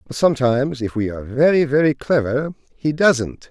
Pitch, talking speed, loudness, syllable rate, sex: 140 Hz, 170 wpm, -18 LUFS, 5.4 syllables/s, male